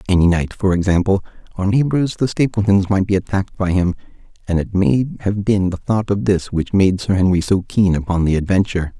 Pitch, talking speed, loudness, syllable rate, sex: 95 Hz, 205 wpm, -17 LUFS, 5.7 syllables/s, male